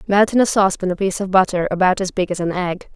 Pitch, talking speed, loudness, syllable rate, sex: 190 Hz, 285 wpm, -18 LUFS, 6.9 syllables/s, female